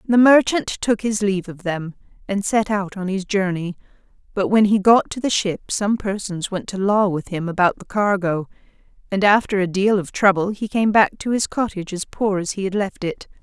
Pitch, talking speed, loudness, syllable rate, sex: 200 Hz, 220 wpm, -20 LUFS, 5.1 syllables/s, female